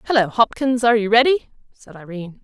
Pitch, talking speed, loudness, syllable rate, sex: 225 Hz, 170 wpm, -17 LUFS, 6.3 syllables/s, female